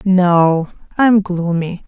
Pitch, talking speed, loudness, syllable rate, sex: 185 Hz, 95 wpm, -14 LUFS, 2.7 syllables/s, female